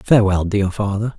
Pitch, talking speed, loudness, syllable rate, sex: 100 Hz, 150 wpm, -18 LUFS, 5.2 syllables/s, male